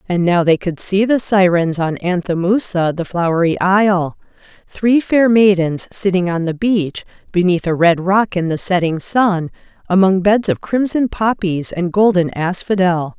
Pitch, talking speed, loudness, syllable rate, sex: 185 Hz, 160 wpm, -15 LUFS, 4.4 syllables/s, female